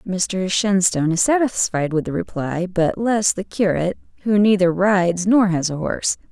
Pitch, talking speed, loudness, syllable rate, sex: 185 Hz, 170 wpm, -19 LUFS, 4.9 syllables/s, female